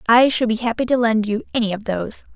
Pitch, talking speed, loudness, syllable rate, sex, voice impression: 230 Hz, 255 wpm, -19 LUFS, 6.6 syllables/s, female, very feminine, young, very thin, slightly relaxed, weak, slightly bright, slightly soft, slightly clear, raspy, cute, intellectual, slightly refreshing, sincere, calm, friendly, slightly reassuring, very unique, slightly elegant, wild, slightly sweet, slightly lively, slightly kind, sharp, slightly modest, light